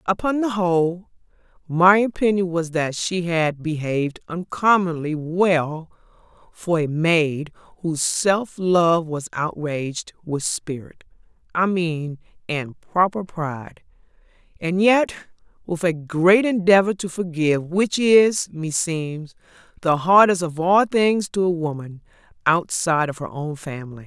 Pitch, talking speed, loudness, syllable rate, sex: 170 Hz, 125 wpm, -21 LUFS, 4.0 syllables/s, female